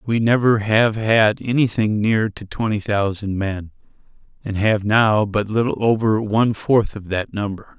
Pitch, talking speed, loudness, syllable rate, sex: 105 Hz, 160 wpm, -19 LUFS, 4.3 syllables/s, male